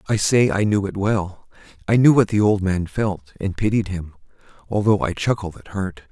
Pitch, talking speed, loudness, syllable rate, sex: 100 Hz, 205 wpm, -20 LUFS, 5.0 syllables/s, male